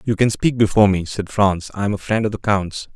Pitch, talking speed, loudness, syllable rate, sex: 100 Hz, 285 wpm, -19 LUFS, 5.7 syllables/s, male